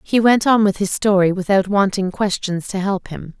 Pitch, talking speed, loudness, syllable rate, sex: 195 Hz, 210 wpm, -17 LUFS, 4.9 syllables/s, female